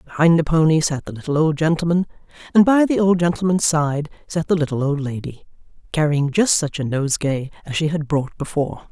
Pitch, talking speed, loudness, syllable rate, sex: 155 Hz, 195 wpm, -19 LUFS, 5.7 syllables/s, female